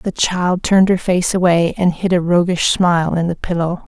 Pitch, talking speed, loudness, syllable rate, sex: 175 Hz, 215 wpm, -16 LUFS, 5.0 syllables/s, female